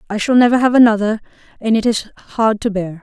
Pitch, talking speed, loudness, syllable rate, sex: 220 Hz, 220 wpm, -15 LUFS, 5.7 syllables/s, female